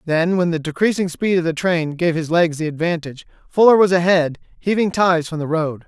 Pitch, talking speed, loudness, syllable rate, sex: 170 Hz, 215 wpm, -18 LUFS, 5.4 syllables/s, male